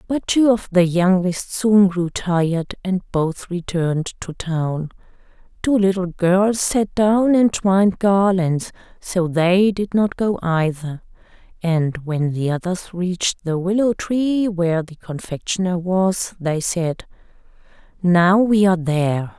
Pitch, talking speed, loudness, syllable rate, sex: 180 Hz, 140 wpm, -19 LUFS, 3.8 syllables/s, female